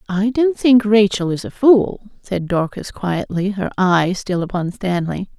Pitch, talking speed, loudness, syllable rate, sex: 200 Hz, 165 wpm, -17 LUFS, 4.1 syllables/s, female